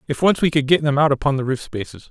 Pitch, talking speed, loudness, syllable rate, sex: 145 Hz, 315 wpm, -18 LUFS, 6.7 syllables/s, male